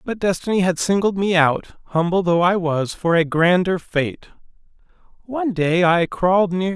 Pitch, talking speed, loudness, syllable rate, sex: 180 Hz, 170 wpm, -19 LUFS, 4.7 syllables/s, male